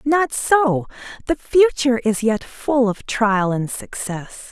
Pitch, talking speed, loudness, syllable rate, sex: 240 Hz, 145 wpm, -19 LUFS, 3.5 syllables/s, female